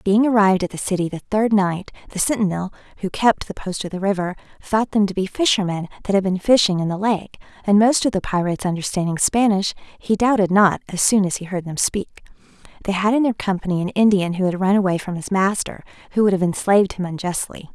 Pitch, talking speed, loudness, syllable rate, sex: 195 Hz, 225 wpm, -20 LUFS, 6.0 syllables/s, female